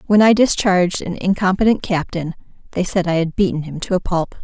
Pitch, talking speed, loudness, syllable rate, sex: 180 Hz, 205 wpm, -17 LUFS, 5.7 syllables/s, female